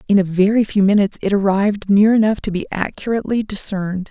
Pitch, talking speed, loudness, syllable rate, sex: 205 Hz, 190 wpm, -17 LUFS, 6.5 syllables/s, female